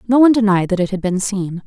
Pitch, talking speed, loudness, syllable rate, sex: 200 Hz, 290 wpm, -16 LUFS, 6.7 syllables/s, female